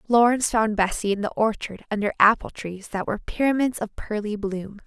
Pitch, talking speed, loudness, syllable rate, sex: 215 Hz, 185 wpm, -23 LUFS, 5.5 syllables/s, female